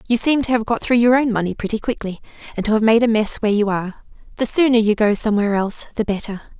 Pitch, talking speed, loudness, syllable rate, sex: 220 Hz, 255 wpm, -18 LUFS, 7.0 syllables/s, female